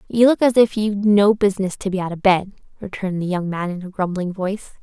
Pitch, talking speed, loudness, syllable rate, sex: 195 Hz, 250 wpm, -19 LUFS, 6.1 syllables/s, female